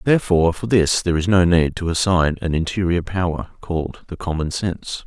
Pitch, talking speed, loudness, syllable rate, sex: 90 Hz, 190 wpm, -20 LUFS, 5.6 syllables/s, male